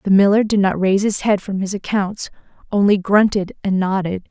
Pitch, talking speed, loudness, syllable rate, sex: 195 Hz, 195 wpm, -17 LUFS, 5.4 syllables/s, female